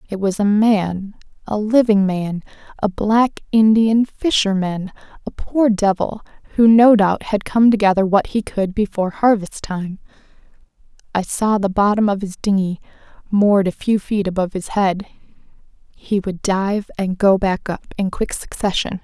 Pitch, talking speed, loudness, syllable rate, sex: 200 Hz, 160 wpm, -18 LUFS, 4.5 syllables/s, female